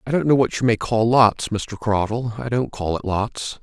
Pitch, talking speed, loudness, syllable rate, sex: 115 Hz, 250 wpm, -20 LUFS, 4.6 syllables/s, male